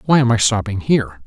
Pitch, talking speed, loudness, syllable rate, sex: 115 Hz, 240 wpm, -16 LUFS, 6.3 syllables/s, male